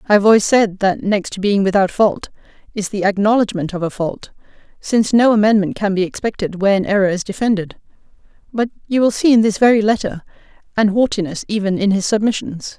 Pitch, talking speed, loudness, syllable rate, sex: 205 Hz, 190 wpm, -16 LUFS, 6.1 syllables/s, female